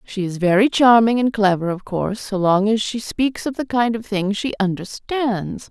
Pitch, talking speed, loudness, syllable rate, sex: 215 Hz, 210 wpm, -19 LUFS, 4.7 syllables/s, female